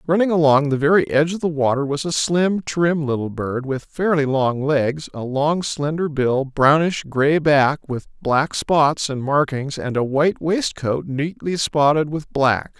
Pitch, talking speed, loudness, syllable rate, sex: 145 Hz, 180 wpm, -19 LUFS, 4.2 syllables/s, male